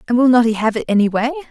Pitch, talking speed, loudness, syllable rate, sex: 235 Hz, 320 wpm, -15 LUFS, 8.0 syllables/s, female